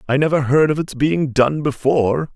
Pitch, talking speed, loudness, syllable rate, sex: 145 Hz, 205 wpm, -17 LUFS, 5.2 syllables/s, male